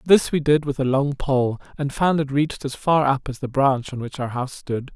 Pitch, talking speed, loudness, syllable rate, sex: 140 Hz, 265 wpm, -22 LUFS, 5.2 syllables/s, male